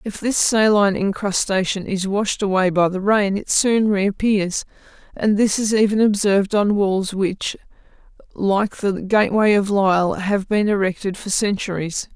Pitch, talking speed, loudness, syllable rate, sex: 200 Hz, 160 wpm, -19 LUFS, 4.6 syllables/s, female